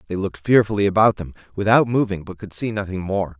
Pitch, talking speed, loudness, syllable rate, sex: 100 Hz, 210 wpm, -20 LUFS, 6.4 syllables/s, male